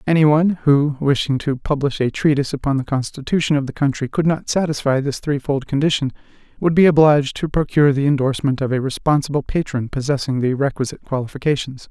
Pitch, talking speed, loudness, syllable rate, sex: 140 Hz, 175 wpm, -18 LUFS, 6.3 syllables/s, male